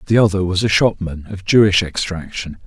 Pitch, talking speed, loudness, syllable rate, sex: 95 Hz, 180 wpm, -17 LUFS, 5.4 syllables/s, male